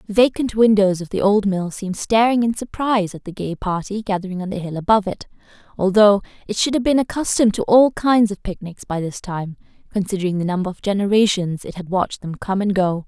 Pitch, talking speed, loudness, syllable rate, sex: 200 Hz, 215 wpm, -19 LUFS, 6.0 syllables/s, female